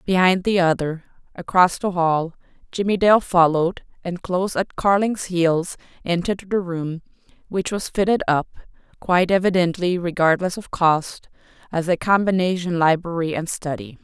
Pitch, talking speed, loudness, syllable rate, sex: 180 Hz, 135 wpm, -20 LUFS, 4.9 syllables/s, female